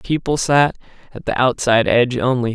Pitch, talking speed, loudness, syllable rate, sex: 125 Hz, 165 wpm, -17 LUFS, 5.6 syllables/s, male